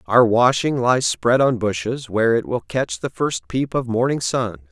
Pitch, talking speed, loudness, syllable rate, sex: 120 Hz, 205 wpm, -19 LUFS, 4.5 syllables/s, male